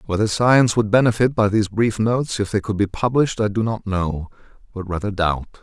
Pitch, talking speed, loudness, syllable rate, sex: 105 Hz, 215 wpm, -19 LUFS, 5.9 syllables/s, male